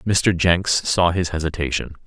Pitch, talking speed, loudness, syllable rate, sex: 85 Hz, 145 wpm, -20 LUFS, 4.1 syllables/s, male